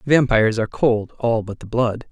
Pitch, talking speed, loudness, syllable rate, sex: 115 Hz, 200 wpm, -19 LUFS, 5.2 syllables/s, male